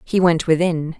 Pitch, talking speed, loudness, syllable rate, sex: 165 Hz, 180 wpm, -18 LUFS, 4.5 syllables/s, female